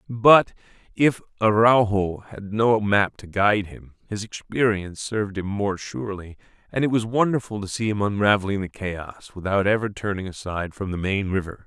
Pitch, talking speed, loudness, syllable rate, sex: 100 Hz, 170 wpm, -22 LUFS, 5.1 syllables/s, male